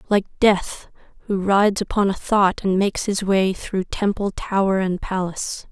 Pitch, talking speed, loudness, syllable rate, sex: 195 Hz, 170 wpm, -20 LUFS, 4.5 syllables/s, female